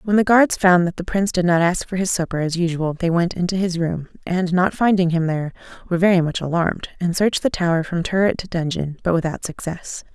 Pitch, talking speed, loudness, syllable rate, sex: 175 Hz, 235 wpm, -20 LUFS, 6.1 syllables/s, female